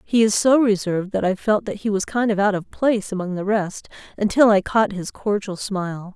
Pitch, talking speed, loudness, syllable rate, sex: 205 Hz, 235 wpm, -20 LUFS, 5.4 syllables/s, female